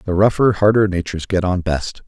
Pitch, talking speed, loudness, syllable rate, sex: 95 Hz, 200 wpm, -17 LUFS, 5.7 syllables/s, male